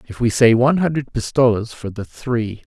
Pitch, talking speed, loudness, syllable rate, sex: 120 Hz, 195 wpm, -18 LUFS, 5.2 syllables/s, male